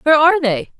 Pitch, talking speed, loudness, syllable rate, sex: 295 Hz, 225 wpm, -14 LUFS, 7.8 syllables/s, female